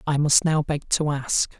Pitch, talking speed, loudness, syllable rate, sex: 150 Hz, 225 wpm, -22 LUFS, 4.3 syllables/s, male